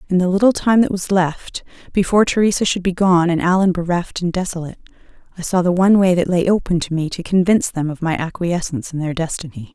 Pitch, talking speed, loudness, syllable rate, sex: 180 Hz, 220 wpm, -17 LUFS, 6.3 syllables/s, female